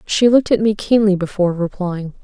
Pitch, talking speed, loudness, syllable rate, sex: 195 Hz, 190 wpm, -16 LUFS, 5.8 syllables/s, female